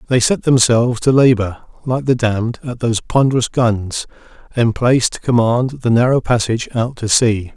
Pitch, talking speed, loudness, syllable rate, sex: 120 Hz, 165 wpm, -15 LUFS, 5.2 syllables/s, male